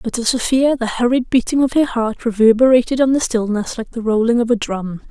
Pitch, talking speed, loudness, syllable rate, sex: 235 Hz, 225 wpm, -16 LUFS, 5.6 syllables/s, female